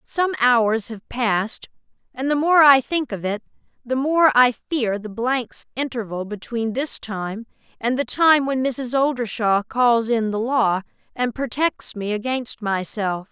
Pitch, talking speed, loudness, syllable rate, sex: 240 Hz, 160 wpm, -21 LUFS, 4.0 syllables/s, female